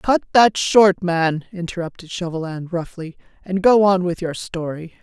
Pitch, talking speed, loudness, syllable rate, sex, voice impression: 180 Hz, 155 wpm, -19 LUFS, 4.5 syllables/s, female, very feminine, very middle-aged, thin, relaxed, weak, slightly bright, very soft, very clear, very fluent, cool, very intellectual, very refreshing, sincere, calm, friendly, very reassuring, very unique, elegant, very sweet, lively, kind